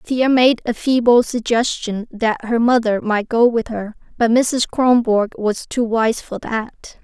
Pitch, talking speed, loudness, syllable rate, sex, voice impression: 230 Hz, 170 wpm, -17 LUFS, 3.8 syllables/s, female, slightly feminine, slightly gender-neutral, slightly young, slightly adult-like, slightly bright, soft, slightly halting, unique, kind, slightly modest